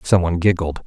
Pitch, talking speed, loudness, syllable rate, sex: 85 Hz, 210 wpm, -18 LUFS, 6.7 syllables/s, male